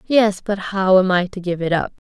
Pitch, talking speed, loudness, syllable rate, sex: 190 Hz, 260 wpm, -18 LUFS, 5.0 syllables/s, female